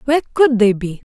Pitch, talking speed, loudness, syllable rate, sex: 240 Hz, 215 wpm, -15 LUFS, 6.2 syllables/s, female